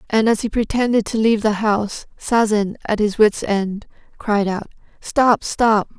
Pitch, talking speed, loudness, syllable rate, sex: 215 Hz, 170 wpm, -18 LUFS, 4.5 syllables/s, female